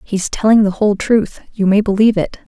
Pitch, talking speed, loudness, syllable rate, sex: 205 Hz, 210 wpm, -14 LUFS, 5.8 syllables/s, female